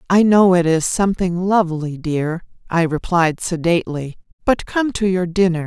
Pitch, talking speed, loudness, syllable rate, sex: 175 Hz, 160 wpm, -18 LUFS, 4.8 syllables/s, female